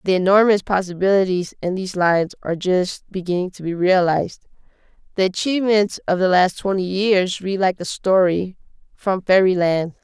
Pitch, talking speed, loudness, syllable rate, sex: 185 Hz, 155 wpm, -19 LUFS, 5.3 syllables/s, female